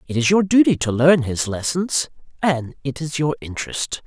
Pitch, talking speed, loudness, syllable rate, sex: 145 Hz, 190 wpm, -19 LUFS, 4.9 syllables/s, male